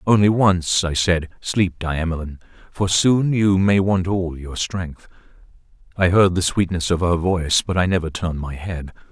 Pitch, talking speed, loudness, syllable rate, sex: 90 Hz, 180 wpm, -19 LUFS, 4.6 syllables/s, male